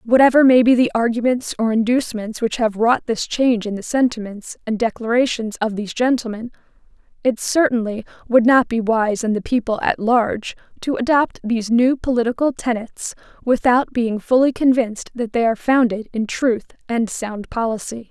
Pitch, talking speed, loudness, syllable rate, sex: 235 Hz, 165 wpm, -18 LUFS, 5.3 syllables/s, female